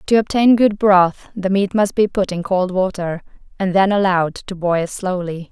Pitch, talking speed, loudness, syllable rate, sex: 190 Hz, 195 wpm, -17 LUFS, 4.6 syllables/s, female